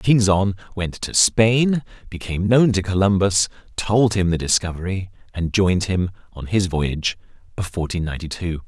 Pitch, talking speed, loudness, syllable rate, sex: 95 Hz, 150 wpm, -20 LUFS, 5.0 syllables/s, male